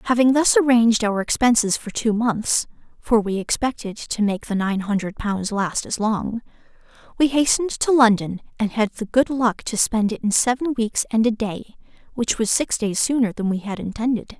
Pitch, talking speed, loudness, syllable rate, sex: 225 Hz, 195 wpm, -20 LUFS, 4.1 syllables/s, female